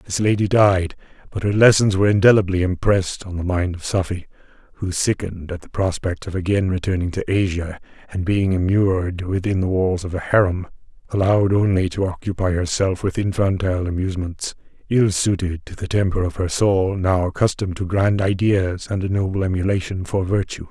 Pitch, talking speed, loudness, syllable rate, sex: 95 Hz, 175 wpm, -20 LUFS, 5.5 syllables/s, male